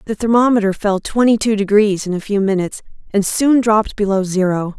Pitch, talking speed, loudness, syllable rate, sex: 205 Hz, 190 wpm, -16 LUFS, 5.8 syllables/s, female